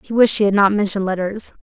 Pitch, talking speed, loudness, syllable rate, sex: 200 Hz, 260 wpm, -17 LUFS, 6.9 syllables/s, female